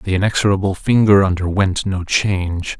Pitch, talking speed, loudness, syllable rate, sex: 95 Hz, 130 wpm, -16 LUFS, 5.2 syllables/s, male